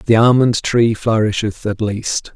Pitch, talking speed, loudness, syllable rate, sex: 110 Hz, 155 wpm, -16 LUFS, 3.9 syllables/s, male